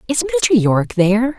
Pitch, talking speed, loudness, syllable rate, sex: 220 Hz, 175 wpm, -15 LUFS, 5.7 syllables/s, female